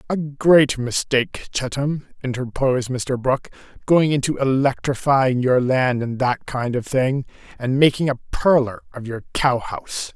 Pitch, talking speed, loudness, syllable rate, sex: 130 Hz, 150 wpm, -20 LUFS, 4.4 syllables/s, male